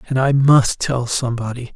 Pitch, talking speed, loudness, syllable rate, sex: 125 Hz, 170 wpm, -17 LUFS, 5.2 syllables/s, male